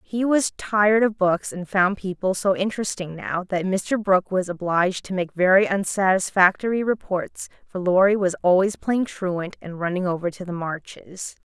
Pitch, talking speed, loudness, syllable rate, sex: 190 Hz, 175 wpm, -22 LUFS, 4.8 syllables/s, female